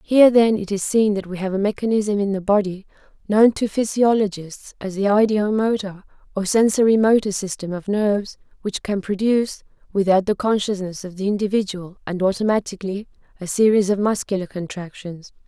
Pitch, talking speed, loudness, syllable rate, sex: 205 Hz, 165 wpm, -20 LUFS, 5.5 syllables/s, female